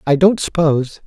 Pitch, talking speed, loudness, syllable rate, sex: 155 Hz, 170 wpm, -15 LUFS, 5.5 syllables/s, male